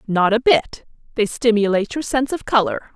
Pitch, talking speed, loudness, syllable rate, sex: 225 Hz, 185 wpm, -18 LUFS, 5.8 syllables/s, female